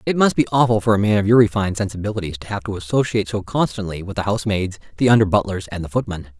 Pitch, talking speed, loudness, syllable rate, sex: 100 Hz, 245 wpm, -19 LUFS, 7.3 syllables/s, male